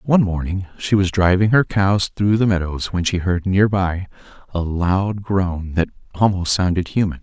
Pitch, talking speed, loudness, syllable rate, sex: 95 Hz, 185 wpm, -19 LUFS, 4.5 syllables/s, male